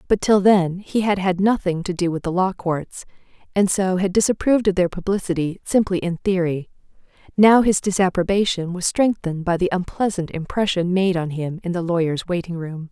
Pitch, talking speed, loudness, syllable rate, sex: 185 Hz, 185 wpm, -20 LUFS, 5.3 syllables/s, female